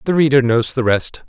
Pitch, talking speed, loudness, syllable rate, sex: 130 Hz, 235 wpm, -15 LUFS, 5.5 syllables/s, male